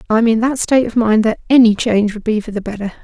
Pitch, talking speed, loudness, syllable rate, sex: 220 Hz, 275 wpm, -15 LUFS, 6.8 syllables/s, female